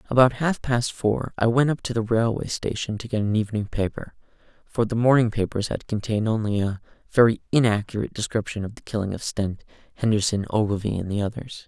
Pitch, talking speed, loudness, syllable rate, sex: 110 Hz, 190 wpm, -24 LUFS, 6.0 syllables/s, male